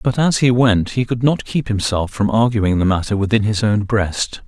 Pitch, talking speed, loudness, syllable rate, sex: 110 Hz, 230 wpm, -17 LUFS, 4.8 syllables/s, male